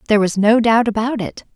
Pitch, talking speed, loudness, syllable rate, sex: 220 Hz, 230 wpm, -16 LUFS, 6.1 syllables/s, female